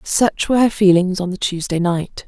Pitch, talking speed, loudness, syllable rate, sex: 190 Hz, 210 wpm, -17 LUFS, 5.1 syllables/s, female